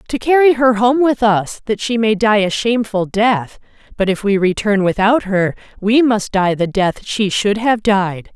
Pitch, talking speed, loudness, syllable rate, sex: 215 Hz, 200 wpm, -15 LUFS, 4.4 syllables/s, female